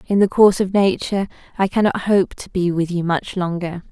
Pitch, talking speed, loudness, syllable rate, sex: 185 Hz, 215 wpm, -18 LUFS, 5.6 syllables/s, female